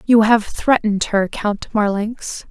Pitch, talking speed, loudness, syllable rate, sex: 215 Hz, 145 wpm, -18 LUFS, 3.9 syllables/s, female